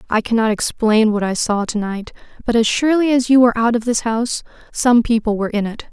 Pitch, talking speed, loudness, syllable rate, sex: 225 Hz, 235 wpm, -17 LUFS, 6.1 syllables/s, female